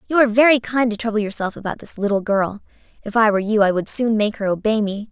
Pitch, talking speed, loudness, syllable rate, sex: 215 Hz, 260 wpm, -19 LUFS, 6.6 syllables/s, female